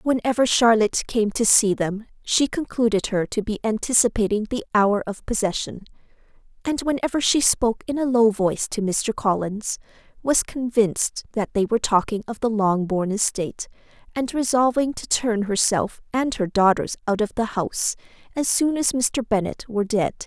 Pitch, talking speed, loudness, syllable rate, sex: 225 Hz, 165 wpm, -22 LUFS, 5.1 syllables/s, female